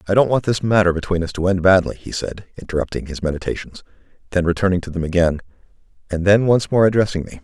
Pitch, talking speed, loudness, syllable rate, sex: 95 Hz, 195 wpm, -19 LUFS, 6.8 syllables/s, male